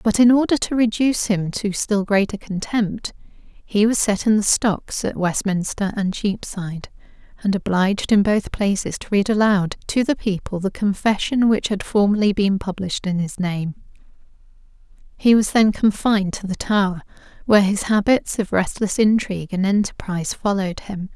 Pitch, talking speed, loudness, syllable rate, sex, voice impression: 200 Hz, 165 wpm, -20 LUFS, 4.9 syllables/s, female, feminine, adult-like, fluent, calm, slightly elegant, slightly modest